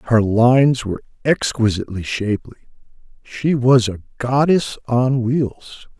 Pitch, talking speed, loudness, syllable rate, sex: 120 Hz, 110 wpm, -18 LUFS, 4.2 syllables/s, male